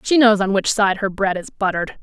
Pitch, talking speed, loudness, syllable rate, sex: 200 Hz, 265 wpm, -18 LUFS, 5.7 syllables/s, female